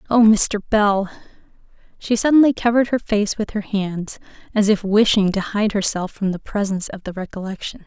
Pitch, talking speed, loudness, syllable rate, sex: 205 Hz, 175 wpm, -19 LUFS, 5.4 syllables/s, female